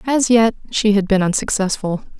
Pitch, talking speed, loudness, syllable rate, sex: 210 Hz, 165 wpm, -17 LUFS, 5.0 syllables/s, female